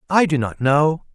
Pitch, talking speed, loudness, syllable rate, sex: 150 Hz, 210 wpm, -18 LUFS, 4.4 syllables/s, male